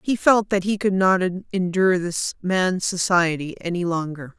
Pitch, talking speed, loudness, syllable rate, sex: 185 Hz, 165 wpm, -21 LUFS, 4.3 syllables/s, female